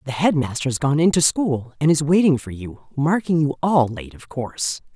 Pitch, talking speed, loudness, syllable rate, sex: 145 Hz, 205 wpm, -20 LUFS, 4.9 syllables/s, female